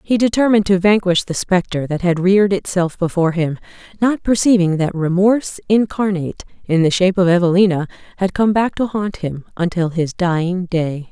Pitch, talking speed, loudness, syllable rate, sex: 185 Hz, 175 wpm, -16 LUFS, 5.5 syllables/s, female